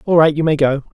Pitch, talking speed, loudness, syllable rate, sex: 150 Hz, 305 wpm, -15 LUFS, 6.7 syllables/s, male